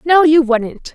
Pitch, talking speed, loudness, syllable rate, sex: 290 Hz, 190 wpm, -12 LUFS, 3.5 syllables/s, female